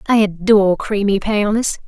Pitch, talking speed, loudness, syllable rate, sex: 205 Hz, 130 wpm, -16 LUFS, 5.5 syllables/s, female